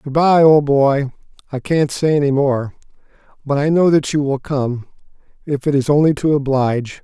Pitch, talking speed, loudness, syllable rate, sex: 140 Hz, 190 wpm, -16 LUFS, 4.9 syllables/s, male